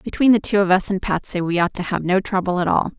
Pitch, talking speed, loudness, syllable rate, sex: 190 Hz, 300 wpm, -19 LUFS, 6.2 syllables/s, female